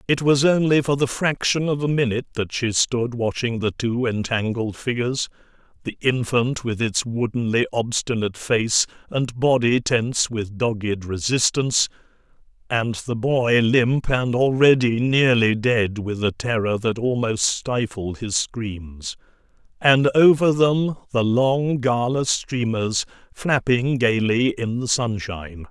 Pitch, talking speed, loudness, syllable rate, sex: 120 Hz, 135 wpm, -21 LUFS, 4.1 syllables/s, male